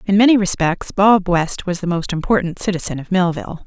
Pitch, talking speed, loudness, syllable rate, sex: 180 Hz, 195 wpm, -17 LUFS, 5.6 syllables/s, female